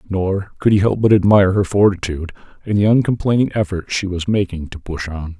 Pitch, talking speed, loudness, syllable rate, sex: 95 Hz, 200 wpm, -17 LUFS, 5.9 syllables/s, male